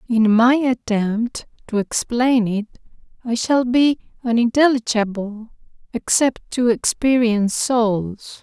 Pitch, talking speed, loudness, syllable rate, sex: 235 Hz, 100 wpm, -18 LUFS, 3.7 syllables/s, female